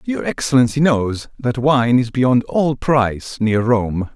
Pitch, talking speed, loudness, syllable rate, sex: 125 Hz, 160 wpm, -17 LUFS, 3.8 syllables/s, male